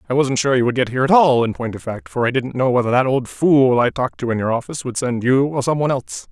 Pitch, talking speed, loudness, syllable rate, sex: 130 Hz, 325 wpm, -18 LUFS, 6.7 syllables/s, male